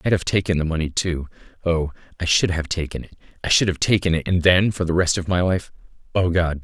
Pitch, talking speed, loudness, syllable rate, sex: 85 Hz, 245 wpm, -21 LUFS, 6.0 syllables/s, male